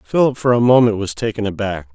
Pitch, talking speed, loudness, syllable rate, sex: 110 Hz, 215 wpm, -16 LUFS, 6.1 syllables/s, male